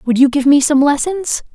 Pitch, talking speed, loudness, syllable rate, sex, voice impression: 285 Hz, 235 wpm, -13 LUFS, 4.9 syllables/s, female, very feminine, young, slightly adult-like, slightly tensed, slightly weak, bright, slightly hard, clear, fluent, very cute, intellectual, very refreshing, sincere, calm, friendly, reassuring, slightly unique, elegant, slightly wild, sweet, slightly lively, kind